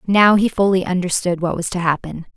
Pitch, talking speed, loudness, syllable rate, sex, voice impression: 180 Hz, 205 wpm, -17 LUFS, 5.5 syllables/s, female, very feminine, slightly young, bright, slightly cute, refreshing, lively